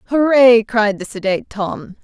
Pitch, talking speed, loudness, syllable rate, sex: 225 Hz, 145 wpm, -15 LUFS, 4.6 syllables/s, female